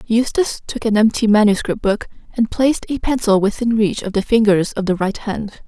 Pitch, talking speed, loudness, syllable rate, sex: 220 Hz, 200 wpm, -17 LUFS, 5.5 syllables/s, female